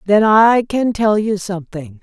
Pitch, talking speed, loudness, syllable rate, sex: 205 Hz, 180 wpm, -14 LUFS, 4.2 syllables/s, female